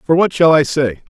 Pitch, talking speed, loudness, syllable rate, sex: 150 Hz, 260 wpm, -14 LUFS, 6.0 syllables/s, male